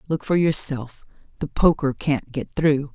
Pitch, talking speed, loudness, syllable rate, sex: 145 Hz, 165 wpm, -22 LUFS, 4.2 syllables/s, female